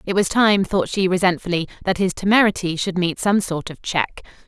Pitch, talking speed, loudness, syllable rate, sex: 185 Hz, 200 wpm, -19 LUFS, 5.4 syllables/s, female